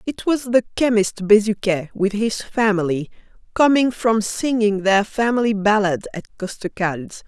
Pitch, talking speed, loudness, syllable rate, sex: 215 Hz, 130 wpm, -19 LUFS, 4.5 syllables/s, female